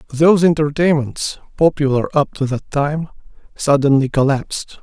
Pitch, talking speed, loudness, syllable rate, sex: 145 Hz, 110 wpm, -17 LUFS, 4.9 syllables/s, male